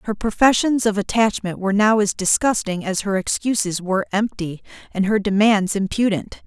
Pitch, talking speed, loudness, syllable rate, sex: 205 Hz, 160 wpm, -19 LUFS, 5.2 syllables/s, female